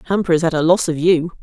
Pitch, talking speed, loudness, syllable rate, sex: 170 Hz, 295 wpm, -16 LUFS, 6.6 syllables/s, female